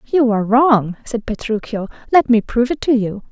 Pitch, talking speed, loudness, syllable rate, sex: 230 Hz, 200 wpm, -17 LUFS, 5.3 syllables/s, female